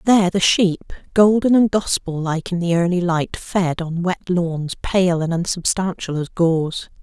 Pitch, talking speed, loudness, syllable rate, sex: 175 Hz, 170 wpm, -19 LUFS, 4.2 syllables/s, female